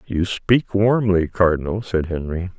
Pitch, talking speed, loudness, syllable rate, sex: 95 Hz, 140 wpm, -20 LUFS, 4.2 syllables/s, male